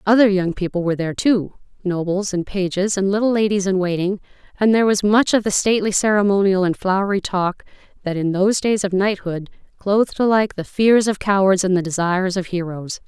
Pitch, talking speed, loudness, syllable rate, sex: 195 Hz, 190 wpm, -18 LUFS, 5.9 syllables/s, female